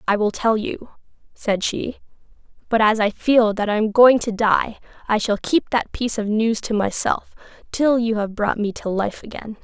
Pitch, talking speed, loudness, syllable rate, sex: 220 Hz, 205 wpm, -20 LUFS, 4.7 syllables/s, female